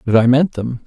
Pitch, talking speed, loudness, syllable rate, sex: 125 Hz, 280 wpm, -15 LUFS, 5.5 syllables/s, male